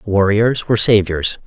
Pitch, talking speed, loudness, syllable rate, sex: 105 Hz, 125 wpm, -15 LUFS, 4.4 syllables/s, male